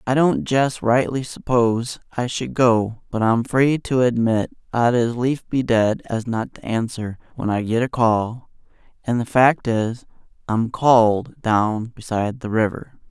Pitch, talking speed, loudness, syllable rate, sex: 120 Hz, 170 wpm, -20 LUFS, 4.0 syllables/s, male